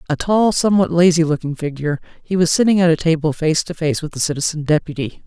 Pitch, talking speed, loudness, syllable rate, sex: 160 Hz, 215 wpm, -17 LUFS, 6.4 syllables/s, female